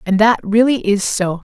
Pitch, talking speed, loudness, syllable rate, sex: 210 Hz, 200 wpm, -15 LUFS, 4.5 syllables/s, female